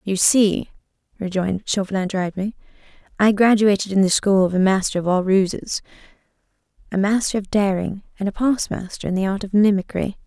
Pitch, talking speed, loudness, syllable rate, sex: 195 Hz, 165 wpm, -20 LUFS, 5.5 syllables/s, female